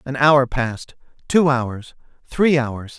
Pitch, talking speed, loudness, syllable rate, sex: 135 Hz, 140 wpm, -18 LUFS, 3.5 syllables/s, male